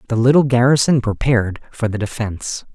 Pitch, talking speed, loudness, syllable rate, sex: 120 Hz, 155 wpm, -17 LUFS, 5.9 syllables/s, male